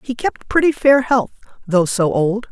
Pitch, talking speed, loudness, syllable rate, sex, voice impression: 230 Hz, 190 wpm, -16 LUFS, 4.4 syllables/s, female, feminine, middle-aged, tensed, powerful, clear, fluent, intellectual, friendly, slightly reassuring, lively, slightly strict, slightly sharp